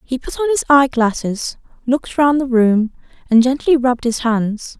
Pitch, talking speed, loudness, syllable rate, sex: 255 Hz, 190 wpm, -16 LUFS, 5.2 syllables/s, female